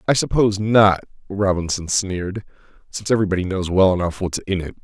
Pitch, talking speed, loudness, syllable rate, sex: 95 Hz, 160 wpm, -19 LUFS, 6.2 syllables/s, male